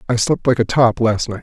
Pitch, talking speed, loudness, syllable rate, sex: 115 Hz, 295 wpm, -16 LUFS, 5.6 syllables/s, male